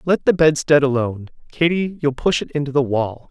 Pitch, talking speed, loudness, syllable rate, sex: 140 Hz, 200 wpm, -18 LUFS, 5.4 syllables/s, male